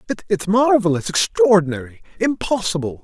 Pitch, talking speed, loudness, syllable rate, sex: 185 Hz, 80 wpm, -18 LUFS, 5.8 syllables/s, male